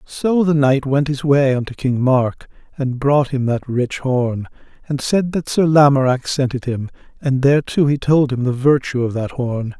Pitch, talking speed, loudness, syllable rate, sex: 135 Hz, 200 wpm, -17 LUFS, 4.5 syllables/s, male